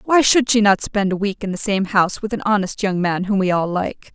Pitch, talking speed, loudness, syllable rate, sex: 200 Hz, 290 wpm, -18 LUFS, 5.5 syllables/s, female